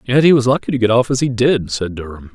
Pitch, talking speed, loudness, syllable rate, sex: 120 Hz, 305 wpm, -15 LUFS, 6.4 syllables/s, male